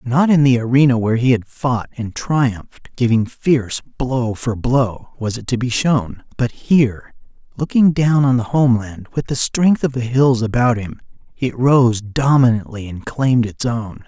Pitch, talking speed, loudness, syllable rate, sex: 120 Hz, 180 wpm, -17 LUFS, 4.5 syllables/s, male